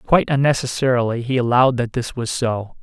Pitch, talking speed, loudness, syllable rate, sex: 125 Hz, 170 wpm, -19 LUFS, 6.0 syllables/s, male